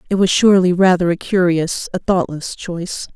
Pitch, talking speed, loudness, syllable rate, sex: 180 Hz, 170 wpm, -16 LUFS, 5.3 syllables/s, female